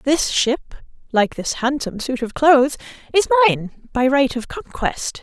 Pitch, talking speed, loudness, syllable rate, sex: 270 Hz, 160 wpm, -19 LUFS, 4.4 syllables/s, female